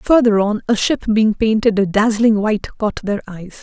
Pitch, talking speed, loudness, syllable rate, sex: 215 Hz, 200 wpm, -16 LUFS, 4.9 syllables/s, female